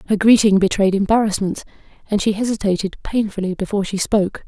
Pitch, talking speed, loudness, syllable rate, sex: 200 Hz, 145 wpm, -18 LUFS, 6.4 syllables/s, female